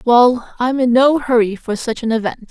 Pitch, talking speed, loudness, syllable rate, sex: 240 Hz, 215 wpm, -15 LUFS, 5.1 syllables/s, female